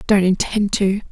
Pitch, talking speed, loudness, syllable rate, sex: 200 Hz, 160 wpm, -18 LUFS, 4.4 syllables/s, female